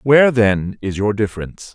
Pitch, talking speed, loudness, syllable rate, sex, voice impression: 110 Hz, 170 wpm, -17 LUFS, 5.4 syllables/s, male, masculine, very adult-like, thick, slightly fluent, cool, wild